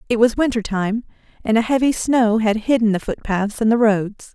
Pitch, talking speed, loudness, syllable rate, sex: 225 Hz, 220 wpm, -18 LUFS, 5.2 syllables/s, female